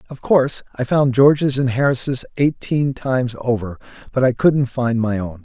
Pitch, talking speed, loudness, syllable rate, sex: 130 Hz, 175 wpm, -18 LUFS, 4.8 syllables/s, male